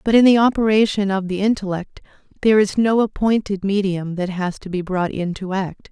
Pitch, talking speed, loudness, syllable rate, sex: 200 Hz, 195 wpm, -19 LUFS, 5.4 syllables/s, female